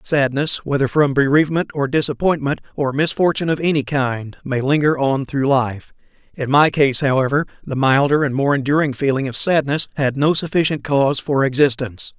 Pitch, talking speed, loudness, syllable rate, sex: 140 Hz, 165 wpm, -18 LUFS, 5.3 syllables/s, male